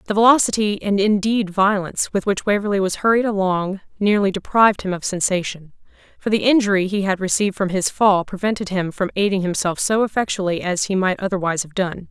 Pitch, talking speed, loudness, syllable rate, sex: 195 Hz, 190 wpm, -19 LUFS, 6.0 syllables/s, female